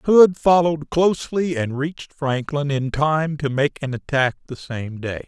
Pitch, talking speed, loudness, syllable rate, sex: 145 Hz, 170 wpm, -20 LUFS, 4.4 syllables/s, male